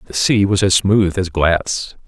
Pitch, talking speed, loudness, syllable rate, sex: 95 Hz, 205 wpm, -16 LUFS, 3.9 syllables/s, male